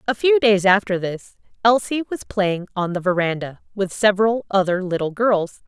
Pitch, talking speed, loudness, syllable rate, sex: 200 Hz, 170 wpm, -20 LUFS, 4.9 syllables/s, female